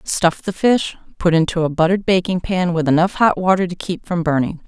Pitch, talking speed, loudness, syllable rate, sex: 175 Hz, 220 wpm, -18 LUFS, 5.5 syllables/s, female